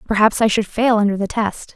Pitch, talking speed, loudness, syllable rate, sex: 215 Hz, 240 wpm, -17 LUFS, 5.7 syllables/s, female